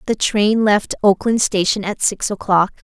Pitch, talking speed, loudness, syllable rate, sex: 205 Hz, 165 wpm, -17 LUFS, 4.4 syllables/s, female